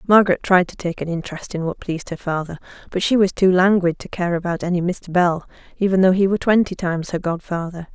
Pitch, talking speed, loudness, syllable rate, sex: 180 Hz, 225 wpm, -20 LUFS, 6.3 syllables/s, female